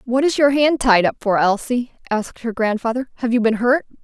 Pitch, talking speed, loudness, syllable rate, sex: 240 Hz, 225 wpm, -18 LUFS, 5.6 syllables/s, female